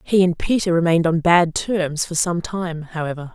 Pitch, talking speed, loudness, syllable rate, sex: 170 Hz, 195 wpm, -19 LUFS, 4.9 syllables/s, female